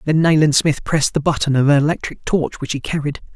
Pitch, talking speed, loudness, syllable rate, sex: 150 Hz, 230 wpm, -17 LUFS, 6.1 syllables/s, male